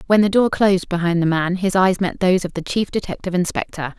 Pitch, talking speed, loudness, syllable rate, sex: 185 Hz, 240 wpm, -19 LUFS, 6.3 syllables/s, female